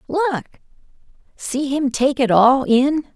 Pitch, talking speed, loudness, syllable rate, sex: 270 Hz, 135 wpm, -17 LUFS, 3.3 syllables/s, female